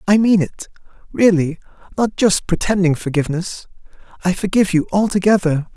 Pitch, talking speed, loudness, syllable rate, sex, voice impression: 185 Hz, 125 wpm, -17 LUFS, 5.5 syllables/s, male, masculine, adult-like, tensed, powerful, fluent, raspy, intellectual, calm, slightly reassuring, slightly wild, lively, slightly strict